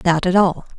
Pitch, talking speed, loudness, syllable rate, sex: 180 Hz, 230 wpm, -17 LUFS, 5.2 syllables/s, female